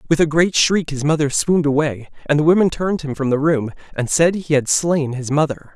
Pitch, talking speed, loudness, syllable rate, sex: 150 Hz, 240 wpm, -18 LUFS, 5.7 syllables/s, male